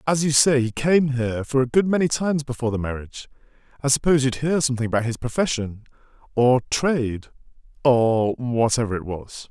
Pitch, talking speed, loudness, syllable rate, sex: 130 Hz, 175 wpm, -21 LUFS, 5.9 syllables/s, male